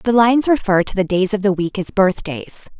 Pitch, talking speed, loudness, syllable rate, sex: 200 Hz, 235 wpm, -17 LUFS, 5.5 syllables/s, female